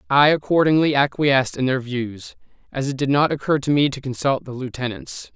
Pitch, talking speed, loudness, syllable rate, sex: 135 Hz, 190 wpm, -20 LUFS, 5.4 syllables/s, male